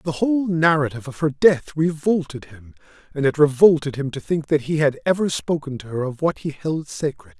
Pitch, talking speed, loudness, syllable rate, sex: 150 Hz, 210 wpm, -20 LUFS, 5.5 syllables/s, male